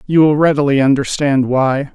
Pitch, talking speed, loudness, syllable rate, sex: 140 Hz, 155 wpm, -14 LUFS, 5.0 syllables/s, male